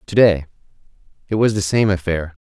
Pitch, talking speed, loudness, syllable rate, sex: 95 Hz, 125 wpm, -18 LUFS, 5.6 syllables/s, male